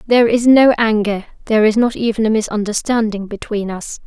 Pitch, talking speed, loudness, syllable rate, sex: 220 Hz, 160 wpm, -15 LUFS, 5.8 syllables/s, female